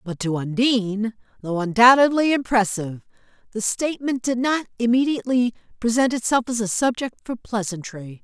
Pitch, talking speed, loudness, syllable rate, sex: 230 Hz, 130 wpm, -21 LUFS, 5.4 syllables/s, female